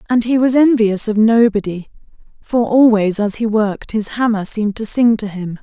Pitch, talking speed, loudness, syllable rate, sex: 220 Hz, 190 wpm, -15 LUFS, 5.1 syllables/s, female